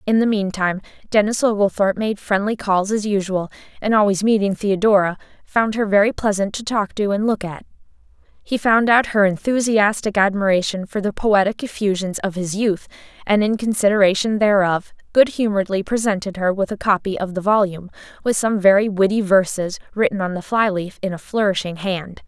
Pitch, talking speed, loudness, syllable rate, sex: 200 Hz, 175 wpm, -19 LUFS, 5.5 syllables/s, female